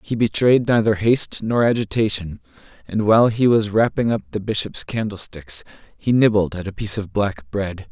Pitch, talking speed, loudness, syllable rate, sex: 105 Hz, 175 wpm, -19 LUFS, 5.2 syllables/s, male